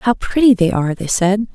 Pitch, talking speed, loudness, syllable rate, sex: 205 Hz, 235 wpm, -15 LUFS, 5.6 syllables/s, female